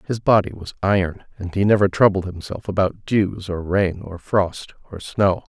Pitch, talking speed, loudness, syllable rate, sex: 95 Hz, 185 wpm, -20 LUFS, 4.7 syllables/s, male